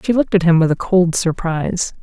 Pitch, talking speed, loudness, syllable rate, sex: 175 Hz, 235 wpm, -16 LUFS, 5.9 syllables/s, female